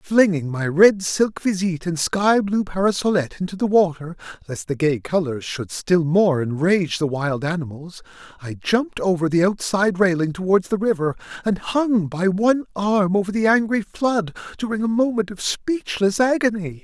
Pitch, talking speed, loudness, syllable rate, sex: 185 Hz, 170 wpm, -20 LUFS, 4.9 syllables/s, male